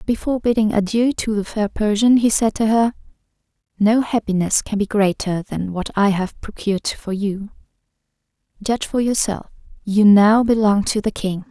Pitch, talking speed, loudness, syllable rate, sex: 210 Hz, 165 wpm, -18 LUFS, 5.0 syllables/s, female